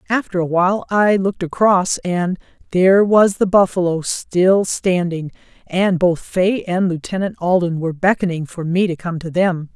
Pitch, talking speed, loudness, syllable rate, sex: 180 Hz, 165 wpm, -17 LUFS, 4.7 syllables/s, female